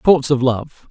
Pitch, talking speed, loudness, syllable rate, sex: 135 Hz, 200 wpm, -17 LUFS, 3.5 syllables/s, male